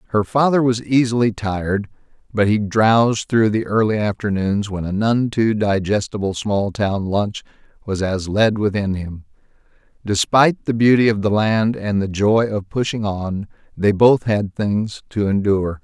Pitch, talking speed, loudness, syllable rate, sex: 105 Hz, 165 wpm, -18 LUFS, 4.5 syllables/s, male